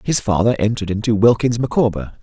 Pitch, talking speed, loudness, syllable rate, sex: 110 Hz, 160 wpm, -17 LUFS, 6.2 syllables/s, male